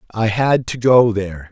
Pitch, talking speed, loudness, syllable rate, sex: 110 Hz, 195 wpm, -16 LUFS, 5.0 syllables/s, male